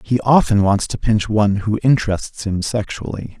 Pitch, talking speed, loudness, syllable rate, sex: 110 Hz, 175 wpm, -18 LUFS, 4.9 syllables/s, male